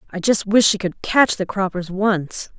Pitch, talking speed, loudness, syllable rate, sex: 195 Hz, 210 wpm, -18 LUFS, 4.2 syllables/s, female